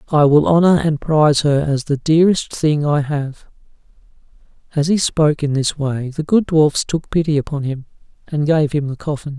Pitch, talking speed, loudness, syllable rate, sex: 150 Hz, 190 wpm, -17 LUFS, 5.0 syllables/s, male